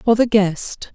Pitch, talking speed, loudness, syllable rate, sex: 210 Hz, 190 wpm, -17 LUFS, 3.7 syllables/s, female